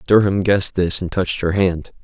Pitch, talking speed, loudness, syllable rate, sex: 95 Hz, 205 wpm, -18 LUFS, 5.5 syllables/s, male